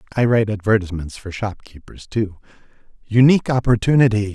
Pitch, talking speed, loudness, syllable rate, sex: 110 Hz, 110 wpm, -18 LUFS, 6.0 syllables/s, male